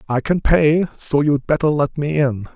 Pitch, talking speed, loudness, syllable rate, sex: 145 Hz, 210 wpm, -18 LUFS, 4.5 syllables/s, male